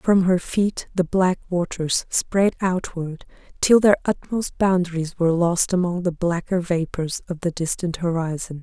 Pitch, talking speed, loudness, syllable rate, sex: 175 Hz, 155 wpm, -22 LUFS, 4.3 syllables/s, female